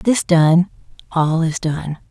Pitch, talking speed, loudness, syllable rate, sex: 165 Hz, 145 wpm, -17 LUFS, 3.3 syllables/s, female